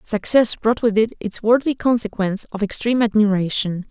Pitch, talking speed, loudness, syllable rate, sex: 220 Hz, 155 wpm, -19 LUFS, 5.5 syllables/s, female